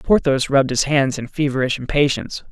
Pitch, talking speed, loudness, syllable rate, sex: 135 Hz, 165 wpm, -18 LUFS, 5.9 syllables/s, male